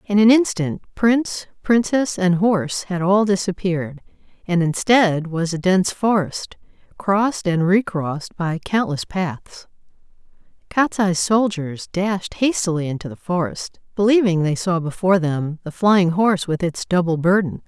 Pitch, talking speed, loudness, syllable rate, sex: 185 Hz, 140 wpm, -19 LUFS, 4.5 syllables/s, female